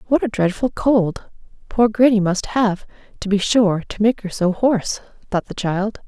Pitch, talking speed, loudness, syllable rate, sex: 210 Hz, 190 wpm, -19 LUFS, 4.6 syllables/s, female